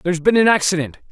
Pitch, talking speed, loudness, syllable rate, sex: 180 Hz, 215 wpm, -16 LUFS, 7.3 syllables/s, male